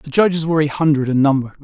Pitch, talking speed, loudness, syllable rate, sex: 150 Hz, 260 wpm, -16 LUFS, 7.1 syllables/s, male